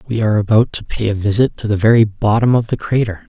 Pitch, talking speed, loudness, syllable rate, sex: 110 Hz, 250 wpm, -15 LUFS, 6.4 syllables/s, male